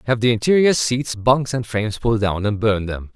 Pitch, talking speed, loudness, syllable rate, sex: 115 Hz, 230 wpm, -19 LUFS, 5.4 syllables/s, male